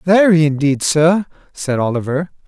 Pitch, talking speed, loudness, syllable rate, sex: 160 Hz, 120 wpm, -15 LUFS, 4.5 syllables/s, male